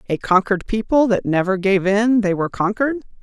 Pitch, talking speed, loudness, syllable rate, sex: 205 Hz, 185 wpm, -18 LUFS, 6.1 syllables/s, female